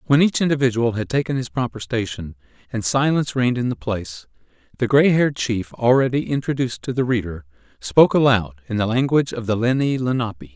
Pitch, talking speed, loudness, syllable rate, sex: 120 Hz, 180 wpm, -20 LUFS, 6.2 syllables/s, male